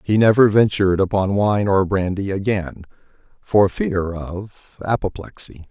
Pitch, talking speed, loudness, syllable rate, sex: 100 Hz, 125 wpm, -18 LUFS, 4.2 syllables/s, male